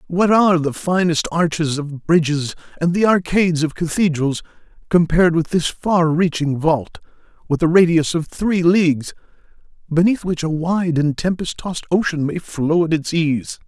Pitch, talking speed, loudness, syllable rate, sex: 165 Hz, 160 wpm, -18 LUFS, 4.7 syllables/s, male